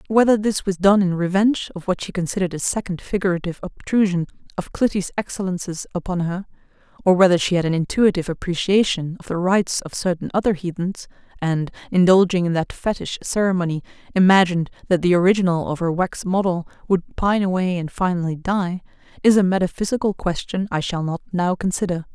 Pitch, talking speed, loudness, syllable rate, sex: 185 Hz, 170 wpm, -20 LUFS, 6.0 syllables/s, female